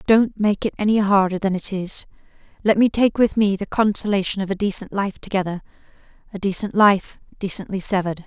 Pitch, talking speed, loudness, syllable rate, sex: 200 Hz, 175 wpm, -20 LUFS, 5.8 syllables/s, female